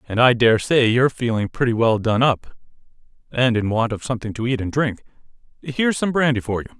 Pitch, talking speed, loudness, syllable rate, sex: 120 Hz, 195 wpm, -19 LUFS, 6.1 syllables/s, male